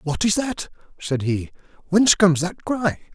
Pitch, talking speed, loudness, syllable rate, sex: 175 Hz, 170 wpm, -21 LUFS, 5.1 syllables/s, male